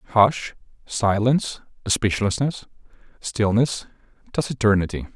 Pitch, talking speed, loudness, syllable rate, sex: 110 Hz, 60 wpm, -22 LUFS, 4.3 syllables/s, male